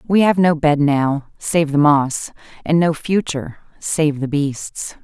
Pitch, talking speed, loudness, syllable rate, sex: 150 Hz, 165 wpm, -17 LUFS, 3.7 syllables/s, female